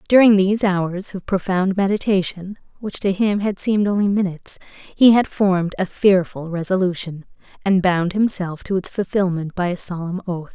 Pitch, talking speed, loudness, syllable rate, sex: 190 Hz, 165 wpm, -19 LUFS, 5.1 syllables/s, female